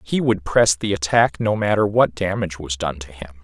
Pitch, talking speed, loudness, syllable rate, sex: 95 Hz, 225 wpm, -19 LUFS, 5.3 syllables/s, male